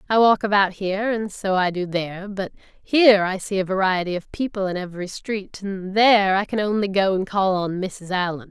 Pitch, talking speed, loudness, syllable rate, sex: 195 Hz, 220 wpm, -21 LUFS, 5.4 syllables/s, female